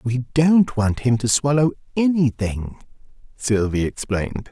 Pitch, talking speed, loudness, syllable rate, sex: 125 Hz, 120 wpm, -20 LUFS, 4.1 syllables/s, male